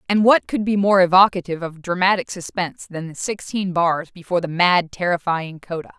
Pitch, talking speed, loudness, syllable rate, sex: 180 Hz, 180 wpm, -19 LUFS, 5.6 syllables/s, female